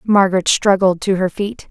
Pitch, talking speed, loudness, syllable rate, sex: 190 Hz, 175 wpm, -16 LUFS, 5.0 syllables/s, female